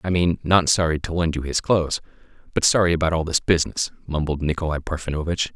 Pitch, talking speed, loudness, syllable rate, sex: 80 Hz, 195 wpm, -22 LUFS, 6.3 syllables/s, male